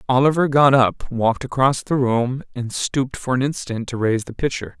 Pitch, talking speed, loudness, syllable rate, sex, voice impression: 130 Hz, 200 wpm, -20 LUFS, 5.3 syllables/s, male, masculine, adult-like, slightly muffled, slightly refreshing, slightly unique